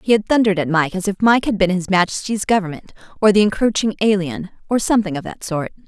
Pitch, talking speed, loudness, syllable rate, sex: 195 Hz, 225 wpm, -18 LUFS, 6.6 syllables/s, female